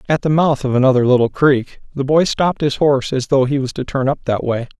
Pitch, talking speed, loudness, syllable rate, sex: 135 Hz, 265 wpm, -16 LUFS, 6.0 syllables/s, male